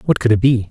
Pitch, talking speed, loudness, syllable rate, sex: 115 Hz, 340 wpm, -15 LUFS, 7.0 syllables/s, male